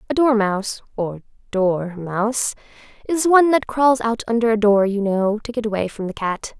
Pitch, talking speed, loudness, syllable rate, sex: 220 Hz, 180 wpm, -19 LUFS, 5.0 syllables/s, female